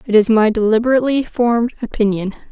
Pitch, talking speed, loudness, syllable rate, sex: 225 Hz, 145 wpm, -16 LUFS, 6.5 syllables/s, female